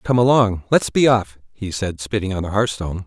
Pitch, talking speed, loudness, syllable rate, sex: 105 Hz, 215 wpm, -19 LUFS, 5.4 syllables/s, male